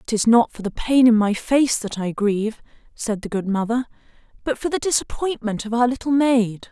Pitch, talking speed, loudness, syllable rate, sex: 230 Hz, 215 wpm, -20 LUFS, 5.3 syllables/s, female